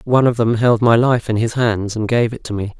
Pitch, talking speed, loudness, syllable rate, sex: 115 Hz, 300 wpm, -16 LUFS, 5.6 syllables/s, male